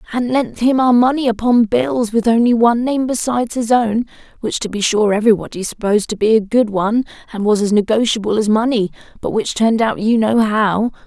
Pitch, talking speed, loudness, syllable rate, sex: 225 Hz, 205 wpm, -16 LUFS, 5.8 syllables/s, female